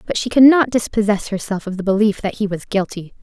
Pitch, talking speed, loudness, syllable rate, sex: 210 Hz, 240 wpm, -17 LUFS, 6.0 syllables/s, female